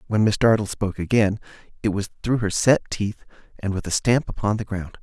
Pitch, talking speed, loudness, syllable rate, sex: 105 Hz, 215 wpm, -22 LUFS, 5.7 syllables/s, male